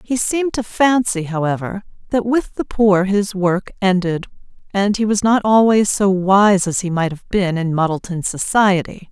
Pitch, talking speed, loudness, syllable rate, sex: 195 Hz, 180 wpm, -17 LUFS, 4.6 syllables/s, female